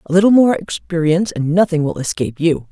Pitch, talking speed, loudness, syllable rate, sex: 170 Hz, 200 wpm, -16 LUFS, 6.2 syllables/s, female